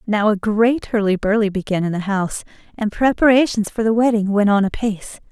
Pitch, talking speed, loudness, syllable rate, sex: 210 Hz, 190 wpm, -18 LUFS, 5.7 syllables/s, female